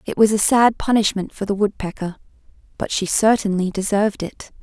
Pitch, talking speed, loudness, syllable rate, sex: 205 Hz, 170 wpm, -19 LUFS, 5.4 syllables/s, female